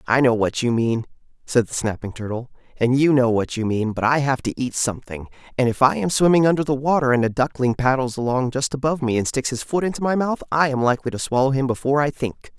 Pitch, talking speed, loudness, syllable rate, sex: 130 Hz, 255 wpm, -20 LUFS, 6.2 syllables/s, male